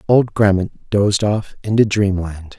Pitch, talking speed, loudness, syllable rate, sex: 100 Hz, 140 wpm, -17 LUFS, 4.6 syllables/s, male